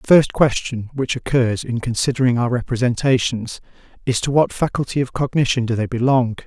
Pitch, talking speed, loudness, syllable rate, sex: 125 Hz, 165 wpm, -19 LUFS, 5.5 syllables/s, male